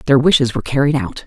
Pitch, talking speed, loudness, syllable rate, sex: 135 Hz, 235 wpm, -15 LUFS, 7.2 syllables/s, female